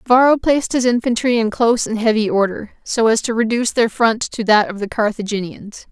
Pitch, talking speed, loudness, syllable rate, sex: 225 Hz, 205 wpm, -17 LUFS, 5.7 syllables/s, female